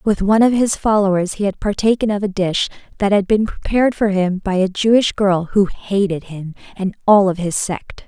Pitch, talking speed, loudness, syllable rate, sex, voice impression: 200 Hz, 215 wpm, -17 LUFS, 5.2 syllables/s, female, very feminine, slightly young, bright, cute, slightly refreshing, friendly, slightly kind